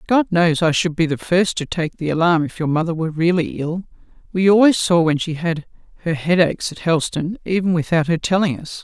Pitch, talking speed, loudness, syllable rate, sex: 170 Hz, 215 wpm, -18 LUFS, 5.7 syllables/s, female